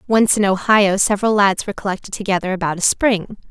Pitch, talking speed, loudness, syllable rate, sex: 200 Hz, 190 wpm, -17 LUFS, 6.2 syllables/s, female